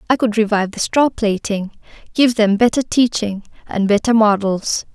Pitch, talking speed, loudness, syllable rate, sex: 215 Hz, 160 wpm, -17 LUFS, 4.9 syllables/s, female